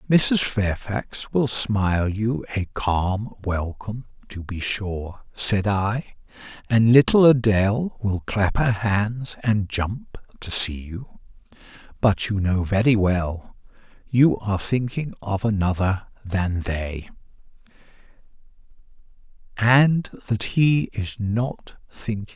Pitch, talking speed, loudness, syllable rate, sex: 105 Hz, 120 wpm, -22 LUFS, 3.5 syllables/s, male